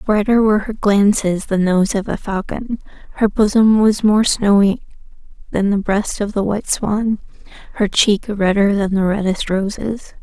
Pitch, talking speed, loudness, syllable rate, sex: 205 Hz, 165 wpm, -16 LUFS, 4.7 syllables/s, female